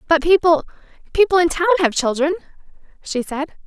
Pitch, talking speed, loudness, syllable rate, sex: 325 Hz, 130 wpm, -18 LUFS, 5.7 syllables/s, female